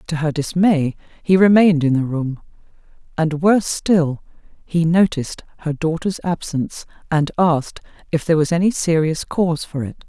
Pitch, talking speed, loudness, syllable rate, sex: 160 Hz, 155 wpm, -18 LUFS, 5.2 syllables/s, female